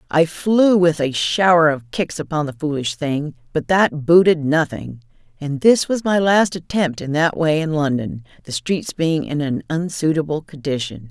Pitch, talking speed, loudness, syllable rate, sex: 155 Hz, 180 wpm, -18 LUFS, 4.5 syllables/s, female